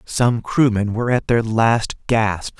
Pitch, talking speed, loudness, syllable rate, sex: 115 Hz, 160 wpm, -18 LUFS, 3.8 syllables/s, male